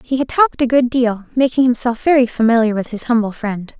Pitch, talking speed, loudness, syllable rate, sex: 240 Hz, 220 wpm, -16 LUFS, 5.9 syllables/s, female